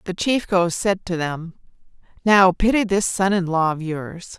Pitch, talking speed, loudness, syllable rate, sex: 185 Hz, 190 wpm, -20 LUFS, 4.2 syllables/s, female